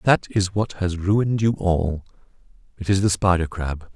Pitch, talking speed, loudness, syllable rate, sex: 95 Hz, 165 wpm, -22 LUFS, 4.6 syllables/s, male